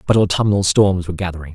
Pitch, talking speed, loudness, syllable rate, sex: 95 Hz, 195 wpm, -17 LUFS, 7.1 syllables/s, male